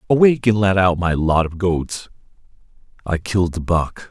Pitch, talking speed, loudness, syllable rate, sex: 95 Hz, 175 wpm, -18 LUFS, 5.1 syllables/s, male